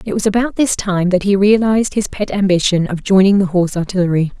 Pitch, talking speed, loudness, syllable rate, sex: 195 Hz, 220 wpm, -15 LUFS, 6.2 syllables/s, female